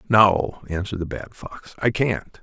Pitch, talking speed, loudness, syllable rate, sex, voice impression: 100 Hz, 175 wpm, -22 LUFS, 4.5 syllables/s, male, very masculine, very adult-like, middle-aged, very thick, tensed, slightly powerful, bright, soft, muffled, fluent, raspy, cool, very intellectual, slightly refreshing, sincere, very mature, friendly, reassuring, elegant, slightly sweet, slightly lively, very kind